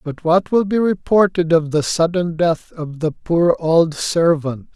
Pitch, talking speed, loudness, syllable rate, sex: 165 Hz, 175 wpm, -17 LUFS, 3.9 syllables/s, male